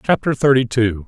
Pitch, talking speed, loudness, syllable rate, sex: 120 Hz, 170 wpm, -16 LUFS, 5.3 syllables/s, male